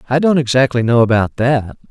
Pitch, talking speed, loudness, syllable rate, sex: 125 Hz, 190 wpm, -14 LUFS, 5.6 syllables/s, male